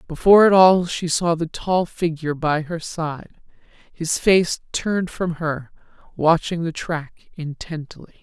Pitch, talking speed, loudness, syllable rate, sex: 165 Hz, 145 wpm, -20 LUFS, 4.1 syllables/s, female